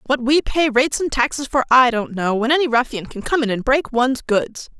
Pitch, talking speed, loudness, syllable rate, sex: 255 Hz, 250 wpm, -18 LUFS, 5.6 syllables/s, female